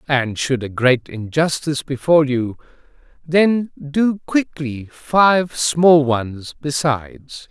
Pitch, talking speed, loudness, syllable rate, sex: 145 Hz, 110 wpm, -18 LUFS, 3.2 syllables/s, male